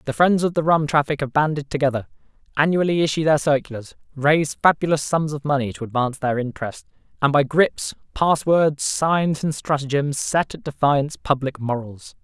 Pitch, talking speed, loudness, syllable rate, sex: 145 Hz, 170 wpm, -21 LUFS, 5.4 syllables/s, male